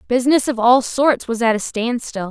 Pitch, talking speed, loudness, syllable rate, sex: 240 Hz, 210 wpm, -17 LUFS, 5.1 syllables/s, female